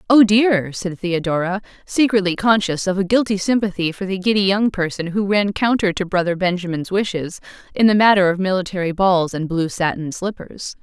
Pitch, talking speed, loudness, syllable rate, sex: 190 Hz, 175 wpm, -18 LUFS, 5.3 syllables/s, female